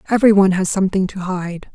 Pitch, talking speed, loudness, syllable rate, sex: 190 Hz, 170 wpm, -16 LUFS, 6.5 syllables/s, female